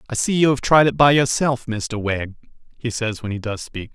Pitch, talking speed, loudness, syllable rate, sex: 120 Hz, 245 wpm, -19 LUFS, 5.2 syllables/s, male